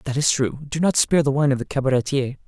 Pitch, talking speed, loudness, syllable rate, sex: 140 Hz, 265 wpm, -21 LUFS, 6.7 syllables/s, male